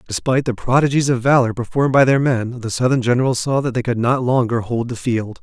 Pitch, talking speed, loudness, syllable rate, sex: 125 Hz, 230 wpm, -17 LUFS, 6.1 syllables/s, male